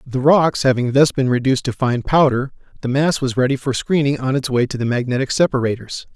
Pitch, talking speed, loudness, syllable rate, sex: 130 Hz, 215 wpm, -17 LUFS, 5.8 syllables/s, male